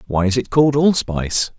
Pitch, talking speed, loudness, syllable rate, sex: 120 Hz, 190 wpm, -17 LUFS, 5.7 syllables/s, male